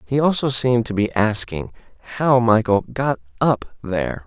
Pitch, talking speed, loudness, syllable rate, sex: 115 Hz, 155 wpm, -19 LUFS, 4.8 syllables/s, male